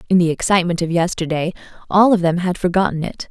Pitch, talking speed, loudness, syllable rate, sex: 175 Hz, 200 wpm, -17 LUFS, 6.6 syllables/s, female